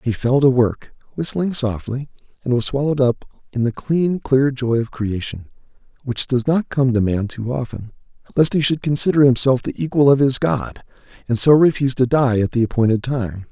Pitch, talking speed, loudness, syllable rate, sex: 130 Hz, 195 wpm, -18 LUFS, 5.2 syllables/s, male